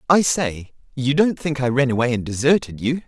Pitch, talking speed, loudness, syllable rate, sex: 135 Hz, 215 wpm, -20 LUFS, 5.3 syllables/s, male